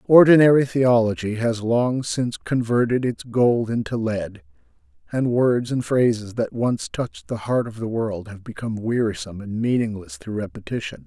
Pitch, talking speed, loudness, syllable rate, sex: 115 Hz, 155 wpm, -21 LUFS, 4.9 syllables/s, male